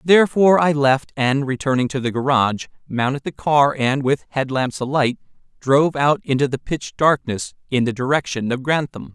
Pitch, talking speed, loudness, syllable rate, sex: 140 Hz, 175 wpm, -19 LUFS, 5.2 syllables/s, male